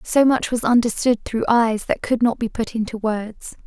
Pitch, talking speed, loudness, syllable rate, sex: 230 Hz, 215 wpm, -20 LUFS, 4.7 syllables/s, female